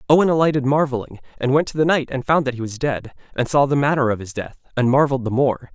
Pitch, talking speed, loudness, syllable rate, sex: 135 Hz, 260 wpm, -19 LUFS, 6.7 syllables/s, male